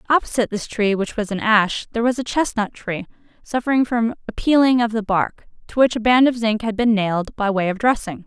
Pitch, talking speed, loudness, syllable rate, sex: 225 Hz, 230 wpm, -19 LUFS, 5.7 syllables/s, female